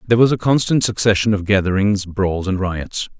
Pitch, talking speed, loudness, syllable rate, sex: 100 Hz, 190 wpm, -17 LUFS, 5.4 syllables/s, male